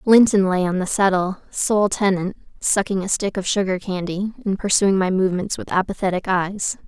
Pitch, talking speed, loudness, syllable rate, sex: 190 Hz, 175 wpm, -20 LUFS, 5.3 syllables/s, female